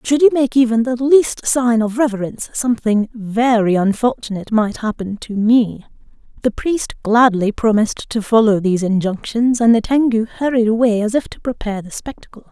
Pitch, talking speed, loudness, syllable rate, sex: 230 Hz, 170 wpm, -16 LUFS, 5.2 syllables/s, female